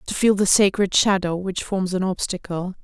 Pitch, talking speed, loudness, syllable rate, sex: 190 Hz, 190 wpm, -20 LUFS, 4.9 syllables/s, female